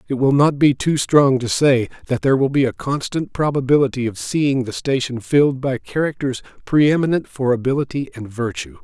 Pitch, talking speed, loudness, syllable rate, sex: 135 Hz, 185 wpm, -18 LUFS, 5.4 syllables/s, male